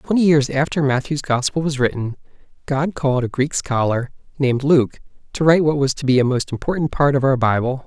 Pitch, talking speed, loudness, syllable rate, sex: 140 Hz, 205 wpm, -19 LUFS, 5.8 syllables/s, male